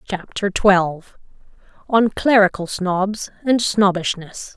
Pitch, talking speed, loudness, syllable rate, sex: 195 Hz, 80 wpm, -18 LUFS, 3.7 syllables/s, female